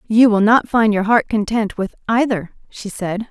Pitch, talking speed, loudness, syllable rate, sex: 215 Hz, 200 wpm, -16 LUFS, 4.5 syllables/s, female